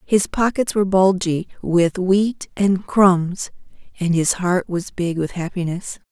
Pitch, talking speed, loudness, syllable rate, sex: 185 Hz, 145 wpm, -19 LUFS, 3.8 syllables/s, female